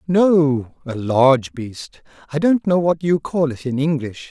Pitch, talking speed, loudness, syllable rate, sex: 145 Hz, 180 wpm, -18 LUFS, 4.0 syllables/s, male